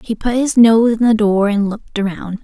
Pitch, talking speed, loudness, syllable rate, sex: 215 Hz, 245 wpm, -14 LUFS, 5.3 syllables/s, female